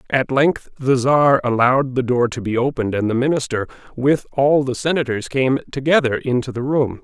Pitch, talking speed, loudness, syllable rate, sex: 130 Hz, 190 wpm, -18 LUFS, 5.3 syllables/s, male